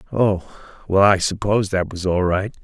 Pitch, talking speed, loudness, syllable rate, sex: 95 Hz, 180 wpm, -19 LUFS, 4.9 syllables/s, male